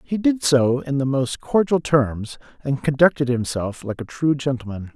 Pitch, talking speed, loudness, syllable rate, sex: 140 Hz, 180 wpm, -21 LUFS, 4.5 syllables/s, male